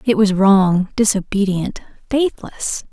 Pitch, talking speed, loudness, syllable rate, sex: 205 Hz, 105 wpm, -17 LUFS, 3.6 syllables/s, female